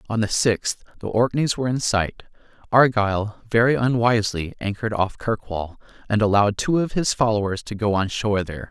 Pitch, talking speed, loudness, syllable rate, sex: 110 Hz, 170 wpm, -21 LUFS, 5.7 syllables/s, male